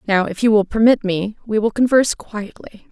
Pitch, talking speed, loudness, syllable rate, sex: 215 Hz, 205 wpm, -17 LUFS, 5.2 syllables/s, female